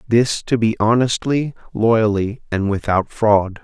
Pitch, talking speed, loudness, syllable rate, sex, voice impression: 110 Hz, 130 wpm, -18 LUFS, 3.8 syllables/s, male, very masculine, slightly old, very thick, tensed, slightly weak, dark, soft, muffled, slightly halting, raspy, cool, intellectual, slightly refreshing, very sincere, very calm, very mature, very friendly, very reassuring, unique, slightly elegant, wild, slightly sweet, slightly lively, kind, modest